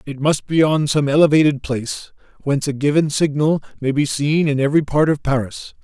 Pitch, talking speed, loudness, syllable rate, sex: 145 Hz, 195 wpm, -18 LUFS, 5.6 syllables/s, male